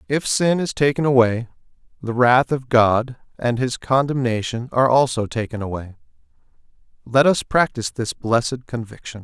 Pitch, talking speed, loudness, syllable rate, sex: 125 Hz, 145 wpm, -19 LUFS, 5.0 syllables/s, male